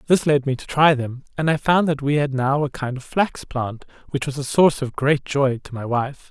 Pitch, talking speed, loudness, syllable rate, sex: 140 Hz, 265 wpm, -21 LUFS, 5.0 syllables/s, male